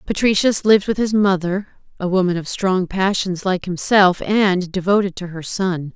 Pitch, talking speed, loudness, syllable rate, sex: 190 Hz, 170 wpm, -18 LUFS, 4.7 syllables/s, female